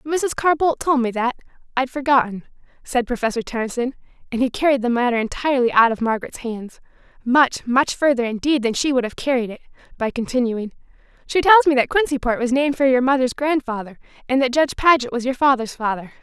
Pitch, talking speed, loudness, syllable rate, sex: 255 Hz, 185 wpm, -19 LUFS, 6.1 syllables/s, female